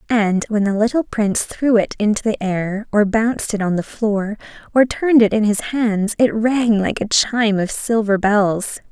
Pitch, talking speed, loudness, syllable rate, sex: 215 Hz, 200 wpm, -17 LUFS, 4.6 syllables/s, female